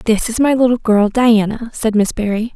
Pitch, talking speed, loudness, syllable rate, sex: 225 Hz, 210 wpm, -15 LUFS, 5.2 syllables/s, female